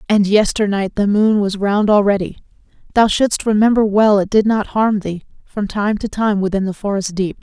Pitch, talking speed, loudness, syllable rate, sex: 205 Hz, 195 wpm, -16 LUFS, 5.0 syllables/s, female